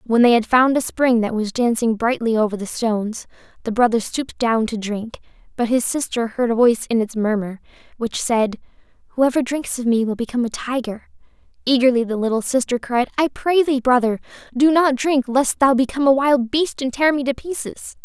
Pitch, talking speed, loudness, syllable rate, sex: 245 Hz, 205 wpm, -19 LUFS, 5.4 syllables/s, female